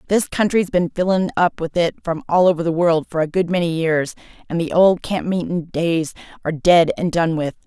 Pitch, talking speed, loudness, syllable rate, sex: 170 Hz, 220 wpm, -19 LUFS, 5.3 syllables/s, female